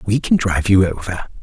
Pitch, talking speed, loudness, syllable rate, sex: 95 Hz, 210 wpm, -17 LUFS, 5.8 syllables/s, male